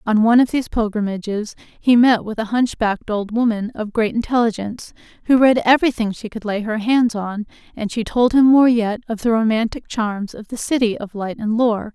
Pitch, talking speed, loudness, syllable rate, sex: 225 Hz, 210 wpm, -18 LUFS, 5.4 syllables/s, female